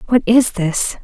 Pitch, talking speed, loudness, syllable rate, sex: 215 Hz, 175 wpm, -15 LUFS, 3.9 syllables/s, female